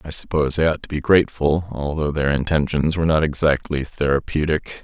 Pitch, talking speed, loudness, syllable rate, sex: 75 Hz, 150 wpm, -20 LUFS, 6.0 syllables/s, male